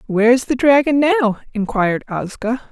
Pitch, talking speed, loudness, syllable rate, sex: 240 Hz, 155 wpm, -16 LUFS, 5.2 syllables/s, female